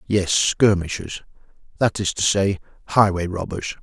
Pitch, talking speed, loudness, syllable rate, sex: 95 Hz, 125 wpm, -20 LUFS, 4.5 syllables/s, male